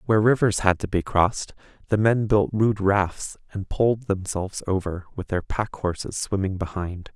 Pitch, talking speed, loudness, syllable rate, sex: 100 Hz, 175 wpm, -24 LUFS, 4.9 syllables/s, male